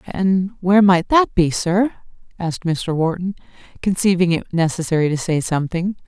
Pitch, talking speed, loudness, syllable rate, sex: 180 Hz, 150 wpm, -18 LUFS, 5.1 syllables/s, female